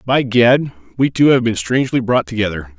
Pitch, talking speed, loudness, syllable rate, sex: 115 Hz, 195 wpm, -15 LUFS, 5.4 syllables/s, male